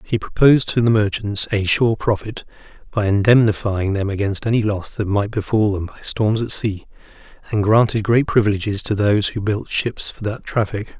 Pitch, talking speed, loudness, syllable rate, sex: 105 Hz, 185 wpm, -19 LUFS, 5.2 syllables/s, male